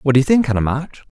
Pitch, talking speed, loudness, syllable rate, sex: 140 Hz, 320 wpm, -17 LUFS, 6.9 syllables/s, male